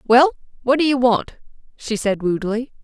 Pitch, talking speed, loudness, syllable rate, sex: 245 Hz, 170 wpm, -19 LUFS, 5.2 syllables/s, female